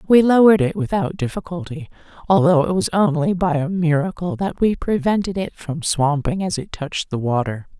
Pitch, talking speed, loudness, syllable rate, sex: 170 Hz, 175 wpm, -19 LUFS, 5.3 syllables/s, female